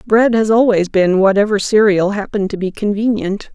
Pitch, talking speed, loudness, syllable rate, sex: 205 Hz, 170 wpm, -14 LUFS, 5.3 syllables/s, female